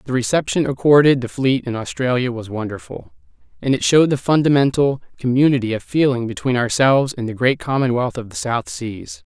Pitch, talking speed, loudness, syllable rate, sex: 130 Hz, 175 wpm, -18 LUFS, 5.6 syllables/s, male